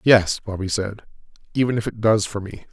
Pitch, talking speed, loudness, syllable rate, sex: 105 Hz, 200 wpm, -22 LUFS, 5.5 syllables/s, male